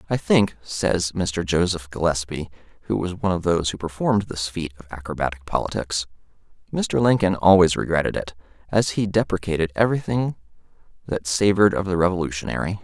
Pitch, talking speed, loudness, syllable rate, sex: 90 Hz, 150 wpm, -22 LUFS, 5.9 syllables/s, male